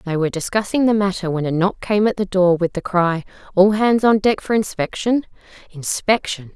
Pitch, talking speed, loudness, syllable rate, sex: 195 Hz, 200 wpm, -18 LUFS, 5.3 syllables/s, female